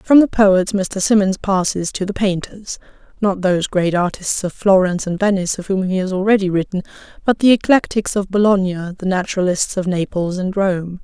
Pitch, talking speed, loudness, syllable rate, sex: 190 Hz, 185 wpm, -17 LUFS, 5.3 syllables/s, female